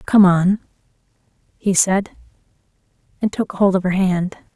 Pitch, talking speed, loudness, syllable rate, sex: 190 Hz, 130 wpm, -18 LUFS, 4.3 syllables/s, female